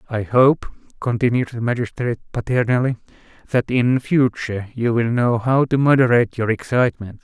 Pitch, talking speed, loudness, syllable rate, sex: 120 Hz, 140 wpm, -19 LUFS, 5.5 syllables/s, male